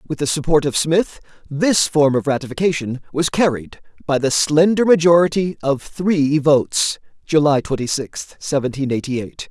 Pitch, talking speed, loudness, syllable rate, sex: 150 Hz, 150 wpm, -17 LUFS, 3.8 syllables/s, male